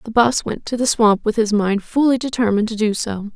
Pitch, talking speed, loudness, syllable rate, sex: 220 Hz, 250 wpm, -18 LUFS, 5.6 syllables/s, female